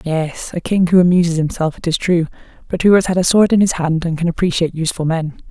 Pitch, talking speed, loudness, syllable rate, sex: 170 Hz, 250 wpm, -16 LUFS, 6.3 syllables/s, female